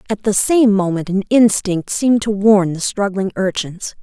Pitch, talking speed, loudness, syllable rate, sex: 200 Hz, 180 wpm, -16 LUFS, 4.6 syllables/s, female